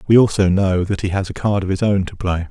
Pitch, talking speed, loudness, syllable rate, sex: 95 Hz, 310 wpm, -18 LUFS, 6.0 syllables/s, male